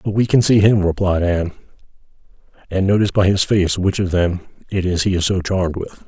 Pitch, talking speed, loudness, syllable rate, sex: 95 Hz, 215 wpm, -17 LUFS, 6.0 syllables/s, male